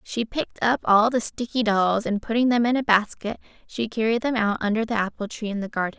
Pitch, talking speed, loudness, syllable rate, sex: 220 Hz, 240 wpm, -23 LUFS, 5.8 syllables/s, female